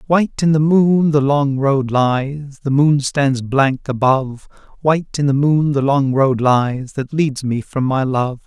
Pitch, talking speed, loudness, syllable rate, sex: 140 Hz, 190 wpm, -16 LUFS, 3.9 syllables/s, male